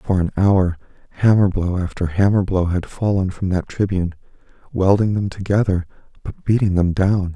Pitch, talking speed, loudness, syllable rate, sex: 95 Hz, 165 wpm, -19 LUFS, 5.1 syllables/s, male